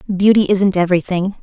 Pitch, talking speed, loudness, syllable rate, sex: 190 Hz, 125 wpm, -15 LUFS, 5.7 syllables/s, female